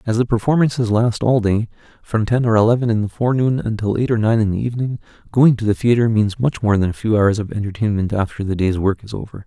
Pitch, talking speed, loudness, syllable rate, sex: 110 Hz, 245 wpm, -18 LUFS, 6.3 syllables/s, male